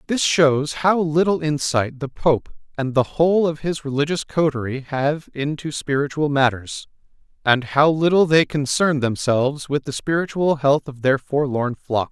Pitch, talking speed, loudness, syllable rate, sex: 145 Hz, 160 wpm, -20 LUFS, 4.5 syllables/s, male